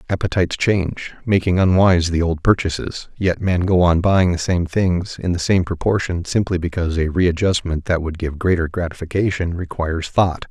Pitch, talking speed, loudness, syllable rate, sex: 90 Hz, 170 wpm, -19 LUFS, 5.3 syllables/s, male